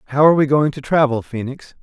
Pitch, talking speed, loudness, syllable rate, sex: 140 Hz, 230 wpm, -17 LUFS, 6.5 syllables/s, male